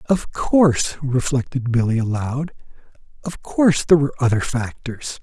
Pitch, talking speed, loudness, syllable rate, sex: 135 Hz, 125 wpm, -19 LUFS, 5.1 syllables/s, male